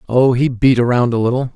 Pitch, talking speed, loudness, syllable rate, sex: 125 Hz, 230 wpm, -15 LUFS, 5.8 syllables/s, male